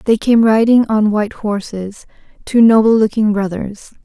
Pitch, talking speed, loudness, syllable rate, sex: 215 Hz, 150 wpm, -13 LUFS, 4.7 syllables/s, female